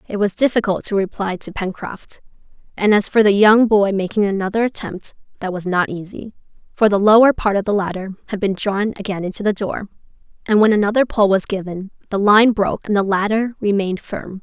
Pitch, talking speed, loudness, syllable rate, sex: 200 Hz, 200 wpm, -17 LUFS, 5.6 syllables/s, female